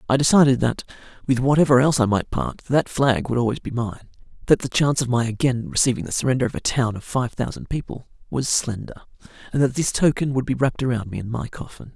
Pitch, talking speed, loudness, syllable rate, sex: 125 Hz, 225 wpm, -21 LUFS, 6.4 syllables/s, male